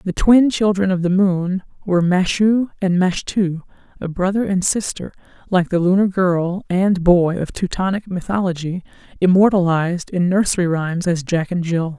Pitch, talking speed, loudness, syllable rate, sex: 185 Hz, 155 wpm, -18 LUFS, 4.8 syllables/s, female